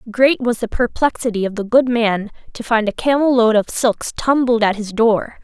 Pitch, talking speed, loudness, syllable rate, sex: 230 Hz, 210 wpm, -17 LUFS, 4.9 syllables/s, female